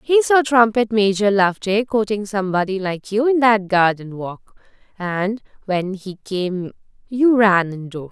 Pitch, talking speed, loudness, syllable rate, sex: 205 Hz, 150 wpm, -18 LUFS, 4.3 syllables/s, female